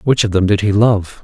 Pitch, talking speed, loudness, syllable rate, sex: 105 Hz, 290 wpm, -14 LUFS, 5.3 syllables/s, male